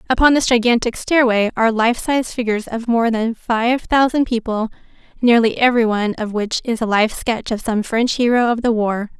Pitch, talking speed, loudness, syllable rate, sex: 230 Hz, 185 wpm, -17 LUFS, 5.2 syllables/s, female